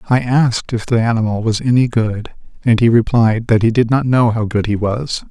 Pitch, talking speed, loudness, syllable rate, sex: 115 Hz, 225 wpm, -15 LUFS, 5.3 syllables/s, male